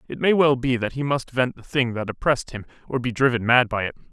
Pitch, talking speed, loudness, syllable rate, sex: 125 Hz, 275 wpm, -22 LUFS, 6.1 syllables/s, male